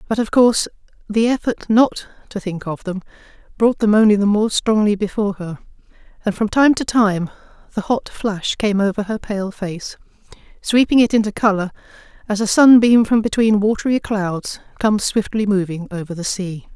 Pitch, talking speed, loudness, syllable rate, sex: 210 Hz, 170 wpm, -17 LUFS, 5.1 syllables/s, female